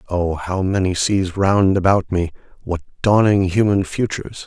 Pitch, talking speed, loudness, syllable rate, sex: 95 Hz, 150 wpm, -18 LUFS, 4.5 syllables/s, male